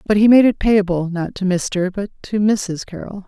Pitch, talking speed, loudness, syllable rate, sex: 195 Hz, 220 wpm, -17 LUFS, 4.7 syllables/s, female